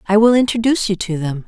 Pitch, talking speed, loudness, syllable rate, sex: 210 Hz, 245 wpm, -16 LUFS, 6.7 syllables/s, female